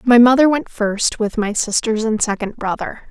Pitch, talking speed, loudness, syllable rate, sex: 225 Hz, 195 wpm, -17 LUFS, 4.7 syllables/s, female